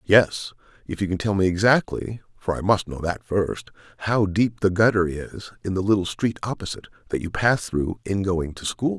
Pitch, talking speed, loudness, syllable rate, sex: 100 Hz, 195 wpm, -23 LUFS, 5.1 syllables/s, male